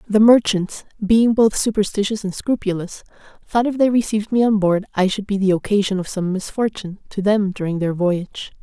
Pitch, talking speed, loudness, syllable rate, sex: 205 Hz, 190 wpm, -19 LUFS, 5.5 syllables/s, female